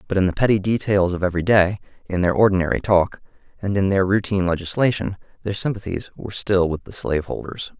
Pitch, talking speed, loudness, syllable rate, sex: 95 Hz, 190 wpm, -21 LUFS, 6.3 syllables/s, male